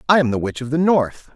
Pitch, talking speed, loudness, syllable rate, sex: 145 Hz, 310 wpm, -19 LUFS, 5.9 syllables/s, male